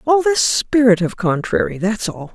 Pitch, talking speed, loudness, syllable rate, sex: 225 Hz, 180 wpm, -17 LUFS, 4.5 syllables/s, female